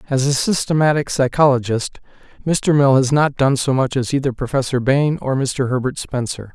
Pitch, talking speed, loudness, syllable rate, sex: 135 Hz, 175 wpm, -17 LUFS, 5.1 syllables/s, male